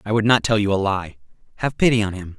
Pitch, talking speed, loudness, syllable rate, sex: 105 Hz, 275 wpm, -20 LUFS, 6.6 syllables/s, male